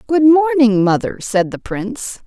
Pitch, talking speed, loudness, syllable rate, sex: 250 Hz, 160 wpm, -15 LUFS, 4.4 syllables/s, female